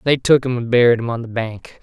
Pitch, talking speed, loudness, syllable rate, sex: 120 Hz, 295 wpm, -17 LUFS, 5.9 syllables/s, male